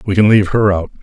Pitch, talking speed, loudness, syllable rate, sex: 100 Hz, 295 wpm, -13 LUFS, 7.3 syllables/s, male